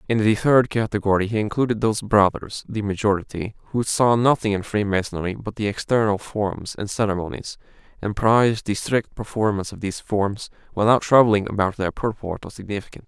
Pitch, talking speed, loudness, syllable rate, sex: 105 Hz, 165 wpm, -22 LUFS, 5.5 syllables/s, male